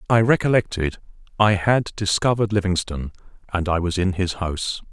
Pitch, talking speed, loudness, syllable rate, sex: 95 Hz, 145 wpm, -21 LUFS, 5.6 syllables/s, male